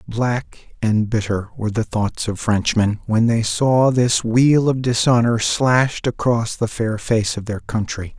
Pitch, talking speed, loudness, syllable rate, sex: 115 Hz, 170 wpm, -19 LUFS, 4.0 syllables/s, male